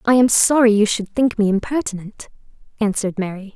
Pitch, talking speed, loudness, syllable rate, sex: 215 Hz, 170 wpm, -17 LUFS, 5.8 syllables/s, female